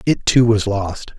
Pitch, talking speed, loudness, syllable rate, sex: 105 Hz, 205 wpm, -17 LUFS, 3.8 syllables/s, male